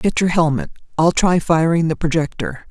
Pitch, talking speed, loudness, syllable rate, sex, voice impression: 165 Hz, 180 wpm, -18 LUFS, 5.1 syllables/s, female, feminine, slightly gender-neutral, very adult-like, middle-aged, slightly thin, slightly relaxed, slightly powerful, slightly dark, soft, clear, fluent, slightly raspy, slightly cute, cool, intellectual, refreshing, very sincere, very calm, friendly, very reassuring, unique, elegant, slightly wild, sweet, slightly lively, kind, slightly sharp, modest, slightly light